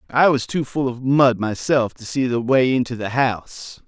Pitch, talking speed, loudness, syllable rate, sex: 125 Hz, 215 wpm, -19 LUFS, 4.6 syllables/s, male